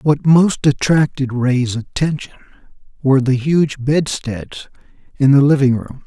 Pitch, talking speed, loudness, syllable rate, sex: 135 Hz, 130 wpm, -16 LUFS, 4.1 syllables/s, male